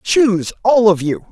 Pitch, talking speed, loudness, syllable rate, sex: 205 Hz, 180 wpm, -14 LUFS, 4.4 syllables/s, female